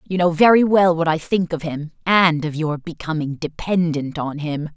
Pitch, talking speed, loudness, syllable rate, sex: 165 Hz, 200 wpm, -19 LUFS, 4.7 syllables/s, female